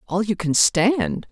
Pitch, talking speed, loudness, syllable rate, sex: 205 Hz, 185 wpm, -19 LUFS, 3.5 syllables/s, female